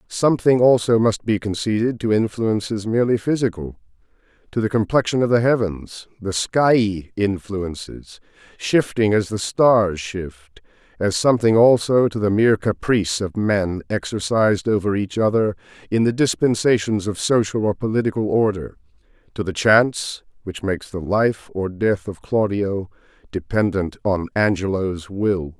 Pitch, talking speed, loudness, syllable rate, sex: 105 Hz, 140 wpm, -20 LUFS, 4.7 syllables/s, male